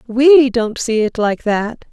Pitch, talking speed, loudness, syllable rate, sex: 235 Hz, 190 wpm, -14 LUFS, 3.5 syllables/s, female